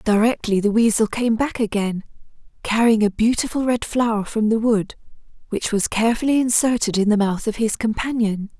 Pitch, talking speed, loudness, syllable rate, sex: 220 Hz, 165 wpm, -20 LUFS, 5.3 syllables/s, female